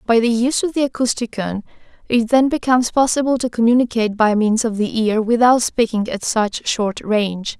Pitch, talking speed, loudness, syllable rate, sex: 230 Hz, 180 wpm, -17 LUFS, 5.5 syllables/s, female